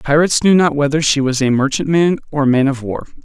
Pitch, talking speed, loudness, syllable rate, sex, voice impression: 145 Hz, 240 wpm, -14 LUFS, 6.4 syllables/s, male, very masculine, slightly young, slightly thick, tensed, weak, slightly dark, slightly soft, clear, fluent, cool, very intellectual, very refreshing, sincere, calm, mature, very friendly, very reassuring, unique, very elegant, wild, sweet, lively, kind